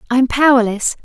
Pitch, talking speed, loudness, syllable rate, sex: 250 Hz, 175 wpm, -14 LUFS, 6.3 syllables/s, female